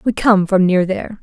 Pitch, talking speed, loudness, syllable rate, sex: 195 Hz, 245 wpm, -15 LUFS, 5.3 syllables/s, female